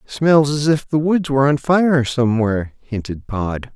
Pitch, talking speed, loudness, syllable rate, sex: 135 Hz, 175 wpm, -17 LUFS, 4.5 syllables/s, male